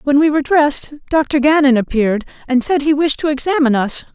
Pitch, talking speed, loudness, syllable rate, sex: 280 Hz, 205 wpm, -15 LUFS, 6.1 syllables/s, female